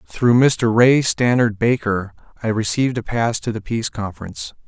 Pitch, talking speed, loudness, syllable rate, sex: 115 Hz, 165 wpm, -18 LUFS, 5.1 syllables/s, male